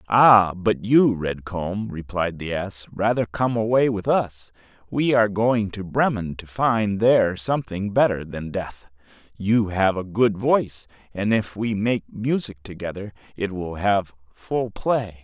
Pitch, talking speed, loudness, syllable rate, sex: 105 Hz, 160 wpm, -22 LUFS, 4.0 syllables/s, male